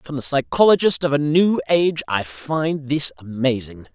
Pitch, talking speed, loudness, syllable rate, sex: 140 Hz, 165 wpm, -19 LUFS, 4.7 syllables/s, male